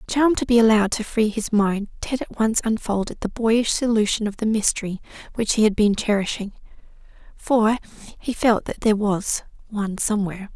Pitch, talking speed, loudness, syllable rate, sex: 215 Hz, 175 wpm, -21 LUFS, 5.6 syllables/s, female